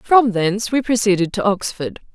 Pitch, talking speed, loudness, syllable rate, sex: 215 Hz, 170 wpm, -18 LUFS, 5.1 syllables/s, female